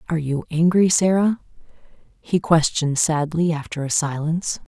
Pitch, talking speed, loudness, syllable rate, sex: 160 Hz, 125 wpm, -20 LUFS, 5.3 syllables/s, female